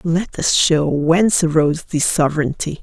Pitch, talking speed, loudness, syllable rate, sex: 160 Hz, 150 wpm, -16 LUFS, 4.8 syllables/s, female